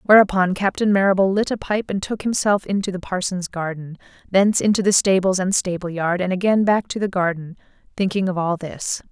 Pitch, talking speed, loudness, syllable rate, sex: 190 Hz, 200 wpm, -20 LUFS, 5.6 syllables/s, female